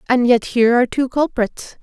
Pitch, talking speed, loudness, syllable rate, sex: 245 Hz, 195 wpm, -17 LUFS, 5.5 syllables/s, female